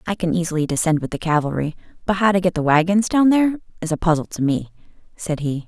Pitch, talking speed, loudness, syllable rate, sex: 175 Hz, 235 wpm, -20 LUFS, 6.7 syllables/s, female